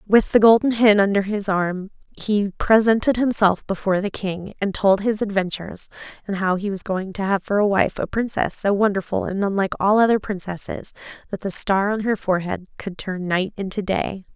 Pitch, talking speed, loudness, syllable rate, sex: 200 Hz, 195 wpm, -20 LUFS, 5.3 syllables/s, female